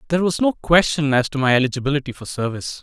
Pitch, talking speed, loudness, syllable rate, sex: 145 Hz, 210 wpm, -19 LUFS, 7.3 syllables/s, male